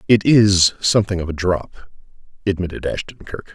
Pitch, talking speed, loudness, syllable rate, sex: 95 Hz, 150 wpm, -18 LUFS, 5.0 syllables/s, male